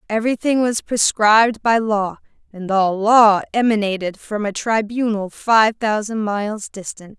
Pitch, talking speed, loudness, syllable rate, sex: 215 Hz, 140 wpm, -17 LUFS, 4.4 syllables/s, female